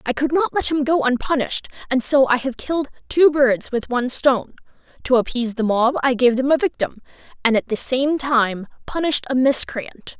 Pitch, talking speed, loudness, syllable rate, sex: 260 Hz, 200 wpm, -19 LUFS, 5.4 syllables/s, female